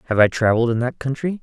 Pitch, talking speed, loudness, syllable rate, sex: 125 Hz, 250 wpm, -19 LUFS, 7.3 syllables/s, male